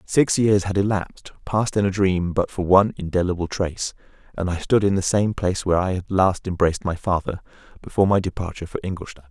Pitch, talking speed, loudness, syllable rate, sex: 95 Hz, 205 wpm, -22 LUFS, 6.3 syllables/s, male